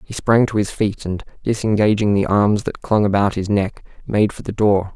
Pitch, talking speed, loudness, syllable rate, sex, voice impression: 105 Hz, 220 wpm, -18 LUFS, 5.0 syllables/s, male, masculine, adult-like, relaxed, soft, slightly muffled, slightly raspy, calm, friendly, slightly reassuring, unique, lively, kind